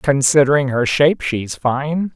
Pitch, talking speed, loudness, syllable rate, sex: 140 Hz, 140 wpm, -16 LUFS, 4.3 syllables/s, male